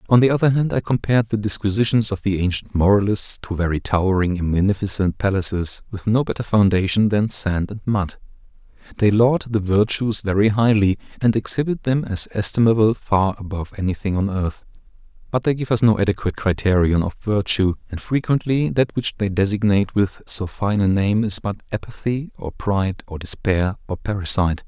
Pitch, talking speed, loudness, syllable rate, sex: 105 Hz, 175 wpm, -20 LUFS, 5.5 syllables/s, male